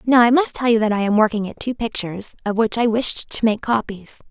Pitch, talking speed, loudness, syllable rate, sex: 225 Hz, 265 wpm, -19 LUFS, 5.7 syllables/s, female